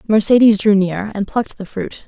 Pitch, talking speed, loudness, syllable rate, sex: 205 Hz, 205 wpm, -15 LUFS, 5.3 syllables/s, female